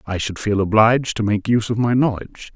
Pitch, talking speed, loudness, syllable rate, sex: 110 Hz, 235 wpm, -18 LUFS, 6.2 syllables/s, male